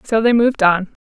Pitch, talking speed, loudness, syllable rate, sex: 215 Hz, 230 wpm, -15 LUFS, 5.9 syllables/s, female